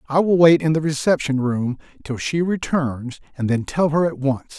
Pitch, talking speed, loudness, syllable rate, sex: 145 Hz, 210 wpm, -19 LUFS, 4.8 syllables/s, male